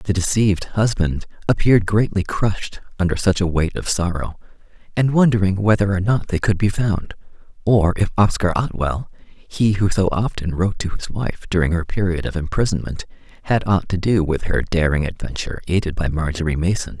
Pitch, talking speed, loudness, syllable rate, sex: 95 Hz, 175 wpm, -20 LUFS, 5.3 syllables/s, male